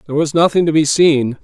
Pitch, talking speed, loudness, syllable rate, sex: 155 Hz, 250 wpm, -13 LUFS, 6.3 syllables/s, male